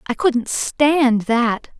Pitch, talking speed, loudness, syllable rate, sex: 255 Hz, 135 wpm, -18 LUFS, 2.5 syllables/s, female